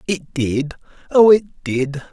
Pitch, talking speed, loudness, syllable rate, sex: 160 Hz, 140 wpm, -17 LUFS, 3.8 syllables/s, male